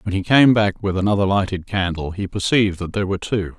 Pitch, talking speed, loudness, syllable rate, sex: 95 Hz, 235 wpm, -19 LUFS, 6.3 syllables/s, male